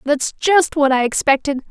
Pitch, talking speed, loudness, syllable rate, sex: 285 Hz, 175 wpm, -16 LUFS, 4.6 syllables/s, female